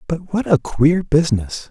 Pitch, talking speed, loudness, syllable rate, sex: 150 Hz, 175 wpm, -17 LUFS, 4.5 syllables/s, male